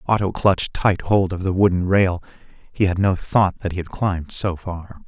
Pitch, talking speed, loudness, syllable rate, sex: 95 Hz, 215 wpm, -20 LUFS, 4.9 syllables/s, male